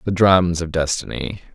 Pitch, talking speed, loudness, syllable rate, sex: 85 Hz, 155 wpm, -19 LUFS, 4.6 syllables/s, male